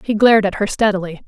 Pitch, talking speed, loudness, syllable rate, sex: 205 Hz, 235 wpm, -16 LUFS, 7.1 syllables/s, female